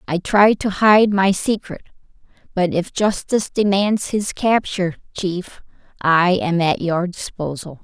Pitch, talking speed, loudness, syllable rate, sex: 190 Hz, 140 wpm, -18 LUFS, 4.0 syllables/s, female